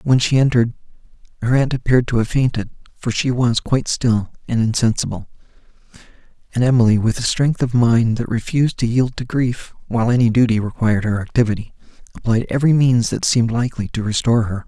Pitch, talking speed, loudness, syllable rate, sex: 120 Hz, 180 wpm, -18 LUFS, 6.3 syllables/s, male